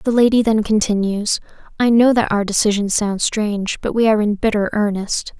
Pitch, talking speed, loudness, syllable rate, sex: 215 Hz, 190 wpm, -17 LUFS, 5.3 syllables/s, female